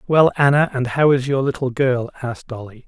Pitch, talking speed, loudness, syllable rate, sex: 130 Hz, 210 wpm, -18 LUFS, 5.5 syllables/s, male